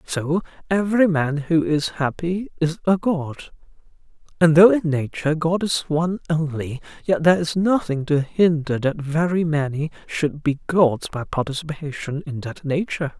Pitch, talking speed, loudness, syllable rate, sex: 160 Hz, 155 wpm, -21 LUFS, 4.7 syllables/s, male